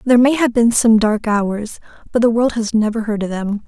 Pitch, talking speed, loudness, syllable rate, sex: 225 Hz, 245 wpm, -16 LUFS, 5.2 syllables/s, female